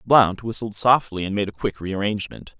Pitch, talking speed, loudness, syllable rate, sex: 105 Hz, 210 wpm, -22 LUFS, 5.6 syllables/s, male